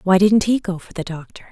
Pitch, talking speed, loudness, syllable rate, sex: 190 Hz, 275 wpm, -19 LUFS, 5.7 syllables/s, female